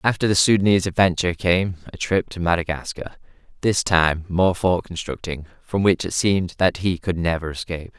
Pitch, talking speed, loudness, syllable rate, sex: 90 Hz, 165 wpm, -21 LUFS, 5.5 syllables/s, male